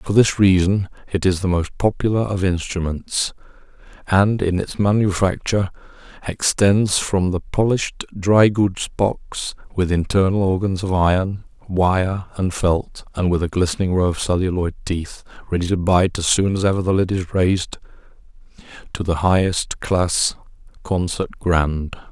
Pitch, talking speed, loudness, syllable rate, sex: 95 Hz, 145 wpm, -19 LUFS, 4.4 syllables/s, male